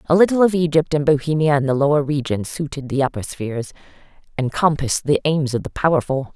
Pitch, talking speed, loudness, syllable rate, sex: 145 Hz, 200 wpm, -19 LUFS, 6.1 syllables/s, female